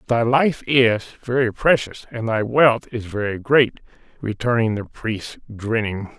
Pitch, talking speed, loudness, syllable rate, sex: 115 Hz, 145 wpm, -20 LUFS, 4.0 syllables/s, male